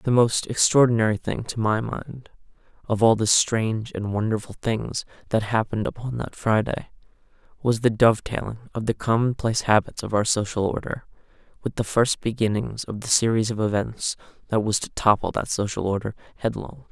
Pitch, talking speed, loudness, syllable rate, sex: 110 Hz, 165 wpm, -23 LUFS, 5.4 syllables/s, male